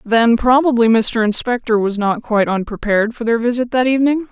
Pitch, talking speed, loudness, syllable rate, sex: 230 Hz, 180 wpm, -15 LUFS, 5.7 syllables/s, female